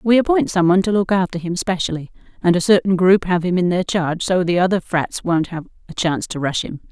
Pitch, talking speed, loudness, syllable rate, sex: 180 Hz, 250 wpm, -18 LUFS, 6.0 syllables/s, female